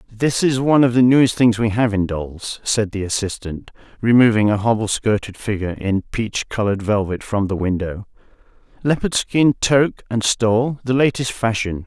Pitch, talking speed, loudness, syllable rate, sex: 110 Hz, 170 wpm, -18 LUFS, 5.0 syllables/s, male